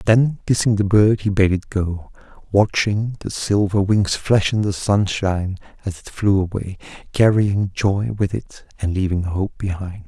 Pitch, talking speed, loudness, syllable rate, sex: 100 Hz, 165 wpm, -19 LUFS, 4.3 syllables/s, male